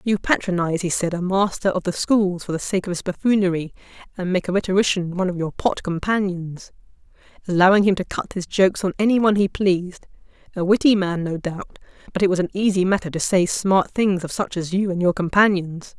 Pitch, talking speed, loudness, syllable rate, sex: 185 Hz, 215 wpm, -20 LUFS, 5.9 syllables/s, female